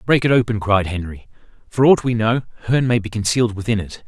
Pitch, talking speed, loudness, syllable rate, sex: 110 Hz, 220 wpm, -18 LUFS, 6.3 syllables/s, male